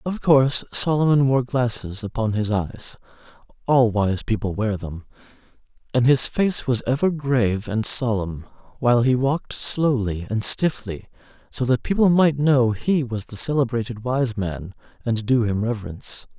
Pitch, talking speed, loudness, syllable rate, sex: 120 Hz, 145 wpm, -21 LUFS, 4.6 syllables/s, male